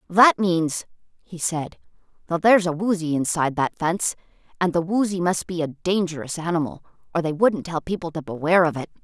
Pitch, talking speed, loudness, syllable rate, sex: 170 Hz, 185 wpm, -22 LUFS, 5.7 syllables/s, female